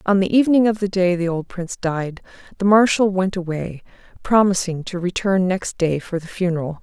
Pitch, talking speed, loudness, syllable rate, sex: 185 Hz, 195 wpm, -19 LUFS, 5.4 syllables/s, female